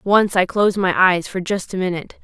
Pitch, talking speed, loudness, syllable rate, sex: 190 Hz, 240 wpm, -18 LUFS, 5.7 syllables/s, female